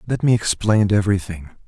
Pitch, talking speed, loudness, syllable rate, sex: 100 Hz, 145 wpm, -18 LUFS, 5.6 syllables/s, male